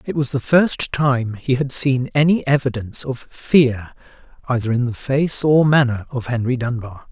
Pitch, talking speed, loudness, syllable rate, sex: 130 Hz, 175 wpm, -18 LUFS, 4.6 syllables/s, male